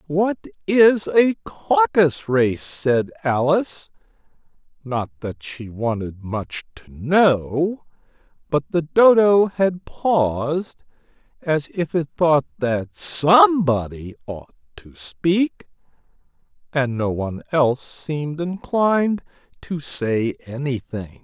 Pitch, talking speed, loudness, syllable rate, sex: 150 Hz, 105 wpm, -20 LUFS, 3.3 syllables/s, male